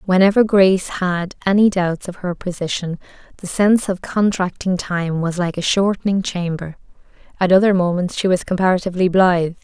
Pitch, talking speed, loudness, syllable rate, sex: 185 Hz, 155 wpm, -18 LUFS, 5.4 syllables/s, female